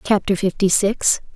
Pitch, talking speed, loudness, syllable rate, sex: 200 Hz, 135 wpm, -18 LUFS, 4.4 syllables/s, female